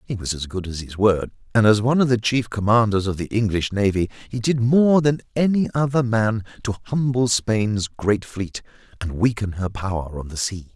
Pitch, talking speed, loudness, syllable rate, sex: 110 Hz, 205 wpm, -21 LUFS, 4.9 syllables/s, male